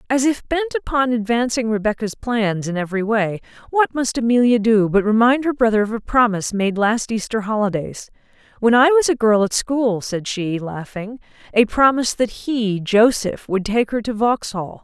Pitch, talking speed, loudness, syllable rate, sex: 225 Hz, 170 wpm, -18 LUFS, 4.9 syllables/s, female